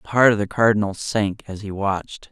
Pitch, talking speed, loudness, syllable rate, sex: 105 Hz, 235 wpm, -20 LUFS, 5.4 syllables/s, male